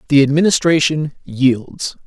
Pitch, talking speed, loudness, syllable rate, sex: 145 Hz, 85 wpm, -16 LUFS, 4.1 syllables/s, male